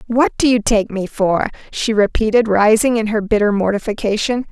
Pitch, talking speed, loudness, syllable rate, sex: 215 Hz, 175 wpm, -16 LUFS, 5.2 syllables/s, female